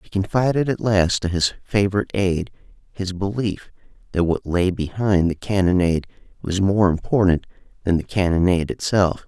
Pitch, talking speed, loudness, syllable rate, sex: 95 Hz, 150 wpm, -20 LUFS, 5.2 syllables/s, male